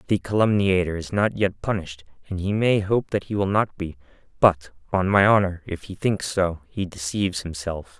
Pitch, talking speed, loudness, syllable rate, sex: 95 Hz, 195 wpm, -23 LUFS, 5.1 syllables/s, male